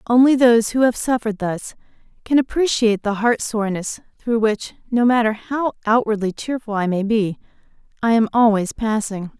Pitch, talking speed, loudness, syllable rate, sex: 225 Hz, 160 wpm, -19 LUFS, 5.3 syllables/s, female